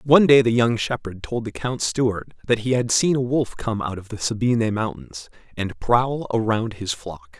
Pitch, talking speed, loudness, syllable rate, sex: 115 Hz, 210 wpm, -22 LUFS, 4.8 syllables/s, male